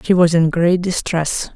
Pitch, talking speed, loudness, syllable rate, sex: 170 Hz, 195 wpm, -16 LUFS, 4.1 syllables/s, female